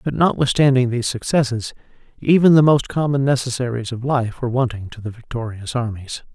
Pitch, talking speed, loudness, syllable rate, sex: 125 Hz, 160 wpm, -19 LUFS, 5.8 syllables/s, male